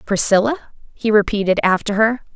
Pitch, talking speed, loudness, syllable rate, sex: 210 Hz, 130 wpm, -17 LUFS, 5.6 syllables/s, female